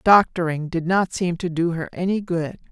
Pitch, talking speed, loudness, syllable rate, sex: 175 Hz, 200 wpm, -22 LUFS, 4.8 syllables/s, female